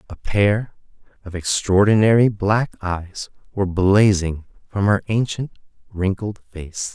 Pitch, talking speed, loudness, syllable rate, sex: 100 Hz, 110 wpm, -19 LUFS, 4.0 syllables/s, male